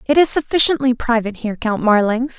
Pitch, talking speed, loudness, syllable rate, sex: 245 Hz, 175 wpm, -17 LUFS, 6.2 syllables/s, female